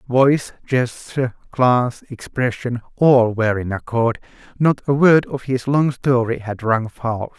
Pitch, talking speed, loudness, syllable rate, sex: 125 Hz, 145 wpm, -19 LUFS, 4.5 syllables/s, male